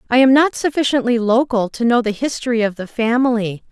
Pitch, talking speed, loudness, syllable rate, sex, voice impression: 240 Hz, 195 wpm, -17 LUFS, 5.8 syllables/s, female, very feminine, slightly young, adult-like, thin, slightly tensed, slightly powerful, bright, hard, very clear, very fluent, cute, slightly cool, intellectual, very refreshing, sincere, calm, friendly, reassuring, unique, elegant, slightly wild, sweet, slightly lively, slightly strict, slightly intense, slightly light